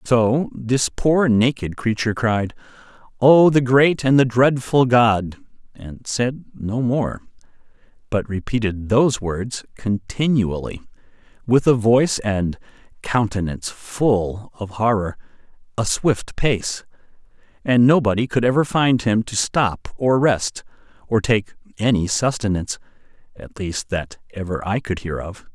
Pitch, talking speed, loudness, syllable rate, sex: 115 Hz, 130 wpm, -19 LUFS, 4.0 syllables/s, male